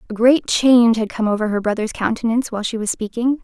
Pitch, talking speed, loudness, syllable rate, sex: 230 Hz, 225 wpm, -18 LUFS, 6.5 syllables/s, female